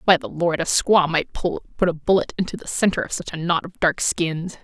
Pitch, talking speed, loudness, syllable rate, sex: 170 Hz, 245 wpm, -21 LUFS, 5.2 syllables/s, female